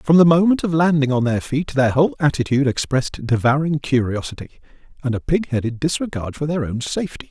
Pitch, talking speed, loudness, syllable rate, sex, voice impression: 140 Hz, 190 wpm, -19 LUFS, 6.1 syllables/s, male, masculine, adult-like, cool, sincere, calm